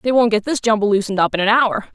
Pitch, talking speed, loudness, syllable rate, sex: 220 Hz, 310 wpm, -17 LUFS, 7.1 syllables/s, female